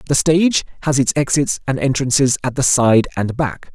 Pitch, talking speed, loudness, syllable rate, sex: 135 Hz, 190 wpm, -16 LUFS, 5.1 syllables/s, male